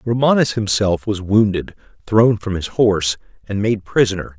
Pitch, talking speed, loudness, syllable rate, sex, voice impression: 105 Hz, 150 wpm, -17 LUFS, 4.8 syllables/s, male, masculine, adult-like, thick, tensed, powerful, clear, fluent, wild, lively, strict, intense